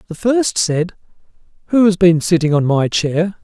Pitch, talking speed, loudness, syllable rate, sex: 175 Hz, 175 wpm, -15 LUFS, 4.6 syllables/s, male